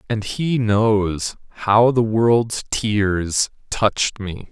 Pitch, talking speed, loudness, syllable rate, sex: 110 Hz, 120 wpm, -19 LUFS, 2.6 syllables/s, male